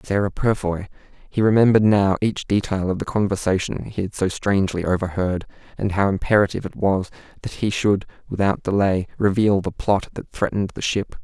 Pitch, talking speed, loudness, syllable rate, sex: 100 Hz, 170 wpm, -21 LUFS, 5.6 syllables/s, male